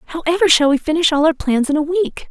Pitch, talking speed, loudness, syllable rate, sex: 310 Hz, 260 wpm, -15 LUFS, 5.7 syllables/s, female